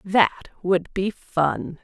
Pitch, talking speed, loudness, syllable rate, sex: 180 Hz, 130 wpm, -23 LUFS, 2.9 syllables/s, female